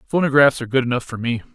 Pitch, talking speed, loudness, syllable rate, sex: 130 Hz, 235 wpm, -18 LUFS, 7.6 syllables/s, male